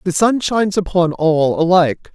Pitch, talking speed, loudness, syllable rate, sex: 180 Hz, 170 wpm, -15 LUFS, 4.9 syllables/s, male